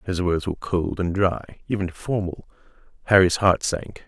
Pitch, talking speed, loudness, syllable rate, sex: 95 Hz, 160 wpm, -23 LUFS, 4.7 syllables/s, male